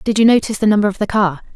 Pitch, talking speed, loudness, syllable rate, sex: 205 Hz, 310 wpm, -15 LUFS, 8.0 syllables/s, female